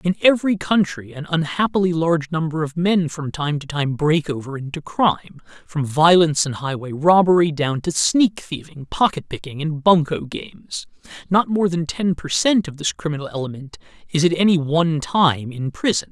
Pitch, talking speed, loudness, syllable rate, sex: 160 Hz, 180 wpm, -19 LUFS, 5.1 syllables/s, male